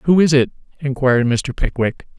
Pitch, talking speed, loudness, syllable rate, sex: 135 Hz, 165 wpm, -18 LUFS, 5.3 syllables/s, male